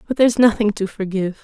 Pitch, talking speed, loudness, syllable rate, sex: 210 Hz, 210 wpm, -18 LUFS, 7.1 syllables/s, female